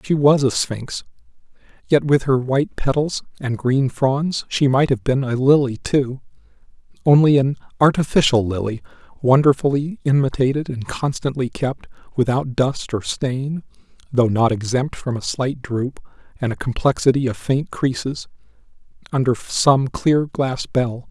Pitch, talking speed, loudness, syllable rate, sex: 135 Hz, 140 wpm, -19 LUFS, 4.3 syllables/s, male